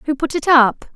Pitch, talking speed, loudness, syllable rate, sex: 280 Hz, 250 wpm, -15 LUFS, 5.2 syllables/s, female